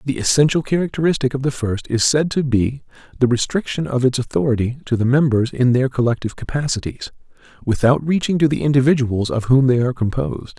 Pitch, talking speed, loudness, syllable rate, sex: 130 Hz, 180 wpm, -18 LUFS, 6.1 syllables/s, male